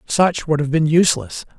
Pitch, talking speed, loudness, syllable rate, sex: 160 Hz, 190 wpm, -17 LUFS, 5.2 syllables/s, male